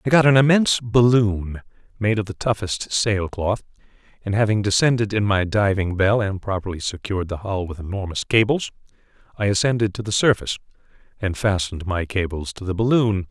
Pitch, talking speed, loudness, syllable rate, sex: 105 Hz, 170 wpm, -21 LUFS, 5.6 syllables/s, male